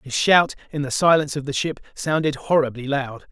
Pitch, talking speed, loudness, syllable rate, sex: 145 Hz, 200 wpm, -21 LUFS, 5.5 syllables/s, male